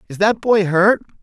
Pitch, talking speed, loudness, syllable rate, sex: 195 Hz, 195 wpm, -16 LUFS, 4.4 syllables/s, male